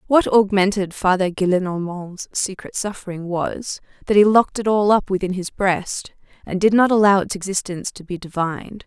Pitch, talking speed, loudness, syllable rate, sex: 190 Hz, 170 wpm, -19 LUFS, 5.2 syllables/s, female